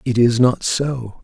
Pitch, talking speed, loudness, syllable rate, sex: 120 Hz, 195 wpm, -17 LUFS, 3.7 syllables/s, male